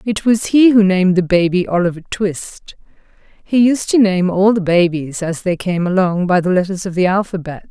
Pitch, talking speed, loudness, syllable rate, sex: 190 Hz, 200 wpm, -15 LUFS, 5.1 syllables/s, female